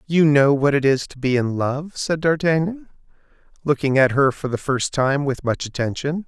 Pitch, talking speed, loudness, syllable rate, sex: 140 Hz, 200 wpm, -20 LUFS, 4.8 syllables/s, male